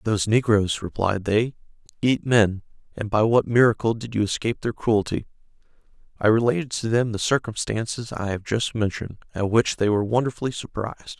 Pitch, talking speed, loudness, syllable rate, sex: 110 Hz, 165 wpm, -23 LUFS, 5.7 syllables/s, male